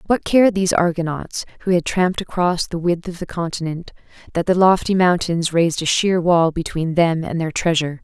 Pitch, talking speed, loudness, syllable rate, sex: 170 Hz, 195 wpm, -18 LUFS, 5.5 syllables/s, female